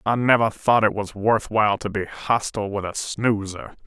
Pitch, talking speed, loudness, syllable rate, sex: 105 Hz, 200 wpm, -22 LUFS, 4.9 syllables/s, male